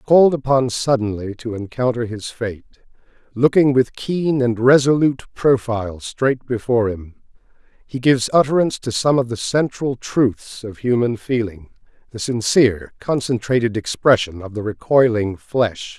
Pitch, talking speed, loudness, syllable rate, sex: 120 Hz, 135 wpm, -18 LUFS, 4.7 syllables/s, male